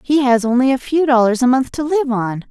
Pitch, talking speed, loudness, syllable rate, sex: 255 Hz, 265 wpm, -15 LUFS, 5.4 syllables/s, female